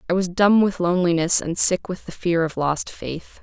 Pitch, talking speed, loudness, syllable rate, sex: 175 Hz, 230 wpm, -20 LUFS, 4.9 syllables/s, female